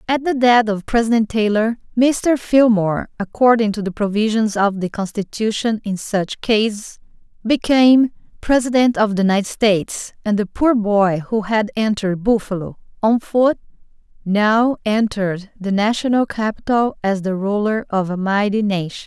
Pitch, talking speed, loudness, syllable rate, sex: 215 Hz, 145 wpm, -18 LUFS, 4.8 syllables/s, female